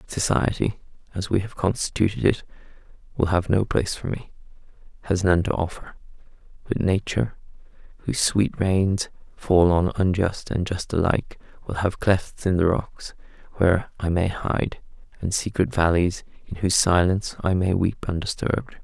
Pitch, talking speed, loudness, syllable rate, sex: 95 Hz, 150 wpm, -23 LUFS, 5.0 syllables/s, male